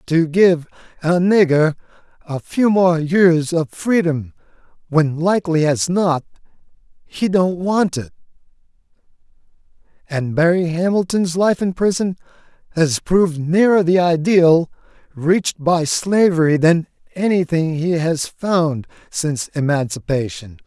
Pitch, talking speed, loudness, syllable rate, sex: 170 Hz, 115 wpm, -17 LUFS, 4.0 syllables/s, male